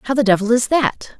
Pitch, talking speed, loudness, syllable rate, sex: 240 Hz, 250 wpm, -16 LUFS, 6.3 syllables/s, female